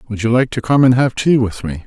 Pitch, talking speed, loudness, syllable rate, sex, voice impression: 120 Hz, 320 wpm, -15 LUFS, 6.1 syllables/s, male, masculine, middle-aged, slightly thick, slightly weak, soft, muffled, slightly raspy, calm, mature, slightly friendly, reassuring, wild, slightly strict